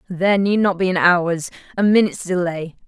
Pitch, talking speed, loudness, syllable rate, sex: 185 Hz, 190 wpm, -18 LUFS, 5.5 syllables/s, female